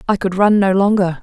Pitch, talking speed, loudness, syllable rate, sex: 195 Hz, 245 wpm, -14 LUFS, 5.6 syllables/s, female